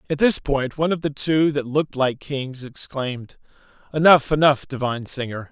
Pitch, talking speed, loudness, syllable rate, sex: 140 Hz, 175 wpm, -21 LUFS, 5.2 syllables/s, male